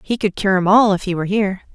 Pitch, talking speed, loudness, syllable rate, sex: 195 Hz, 310 wpm, -17 LUFS, 7.1 syllables/s, female